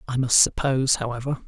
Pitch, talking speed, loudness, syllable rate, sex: 130 Hz, 160 wpm, -21 LUFS, 6.3 syllables/s, male